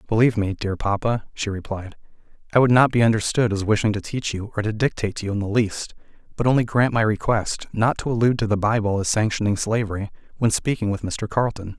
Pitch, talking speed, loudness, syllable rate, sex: 110 Hz, 220 wpm, -22 LUFS, 6.2 syllables/s, male